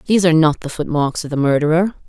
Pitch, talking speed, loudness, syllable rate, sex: 160 Hz, 230 wpm, -16 LUFS, 7.1 syllables/s, female